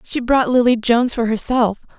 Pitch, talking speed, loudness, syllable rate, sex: 240 Hz, 180 wpm, -17 LUFS, 4.7 syllables/s, female